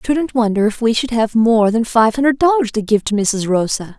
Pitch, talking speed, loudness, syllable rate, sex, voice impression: 230 Hz, 255 wpm, -15 LUFS, 5.4 syllables/s, female, very feminine, slightly young, slightly adult-like, thin, slightly tensed, slightly weak, slightly bright, slightly hard, clear, fluent, slightly raspy, slightly cool, slightly intellectual, refreshing, sincere, calm, friendly, reassuring, slightly unique, slightly wild, slightly sweet, slightly strict, slightly intense